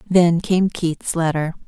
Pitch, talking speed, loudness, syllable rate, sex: 170 Hz, 145 wpm, -19 LUFS, 3.7 syllables/s, female